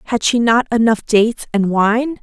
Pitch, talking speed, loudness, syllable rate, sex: 225 Hz, 190 wpm, -15 LUFS, 4.7 syllables/s, female